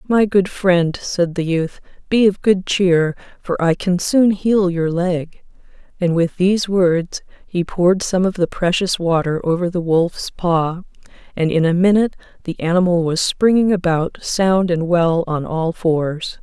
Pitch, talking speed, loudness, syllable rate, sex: 180 Hz, 170 wpm, -17 LUFS, 4.1 syllables/s, female